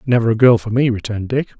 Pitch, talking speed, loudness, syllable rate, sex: 115 Hz, 265 wpm, -16 LUFS, 7.3 syllables/s, male